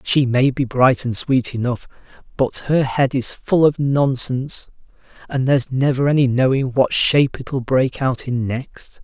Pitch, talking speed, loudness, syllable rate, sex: 130 Hz, 175 wpm, -18 LUFS, 4.3 syllables/s, male